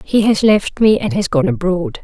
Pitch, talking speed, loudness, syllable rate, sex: 190 Hz, 235 wpm, -15 LUFS, 4.7 syllables/s, female